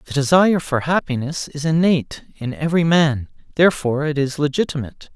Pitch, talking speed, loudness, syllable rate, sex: 145 Hz, 150 wpm, -19 LUFS, 5.9 syllables/s, male